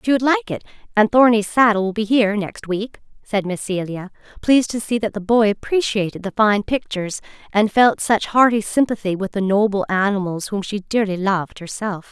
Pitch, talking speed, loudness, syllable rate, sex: 210 Hz, 195 wpm, -19 LUFS, 5.4 syllables/s, female